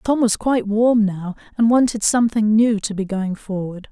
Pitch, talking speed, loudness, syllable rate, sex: 215 Hz, 200 wpm, -18 LUFS, 5.0 syllables/s, female